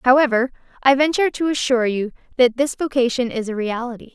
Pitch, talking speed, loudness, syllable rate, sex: 250 Hz, 175 wpm, -19 LUFS, 6.3 syllables/s, female